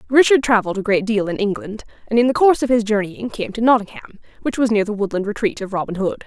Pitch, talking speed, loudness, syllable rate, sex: 215 Hz, 250 wpm, -18 LUFS, 6.6 syllables/s, female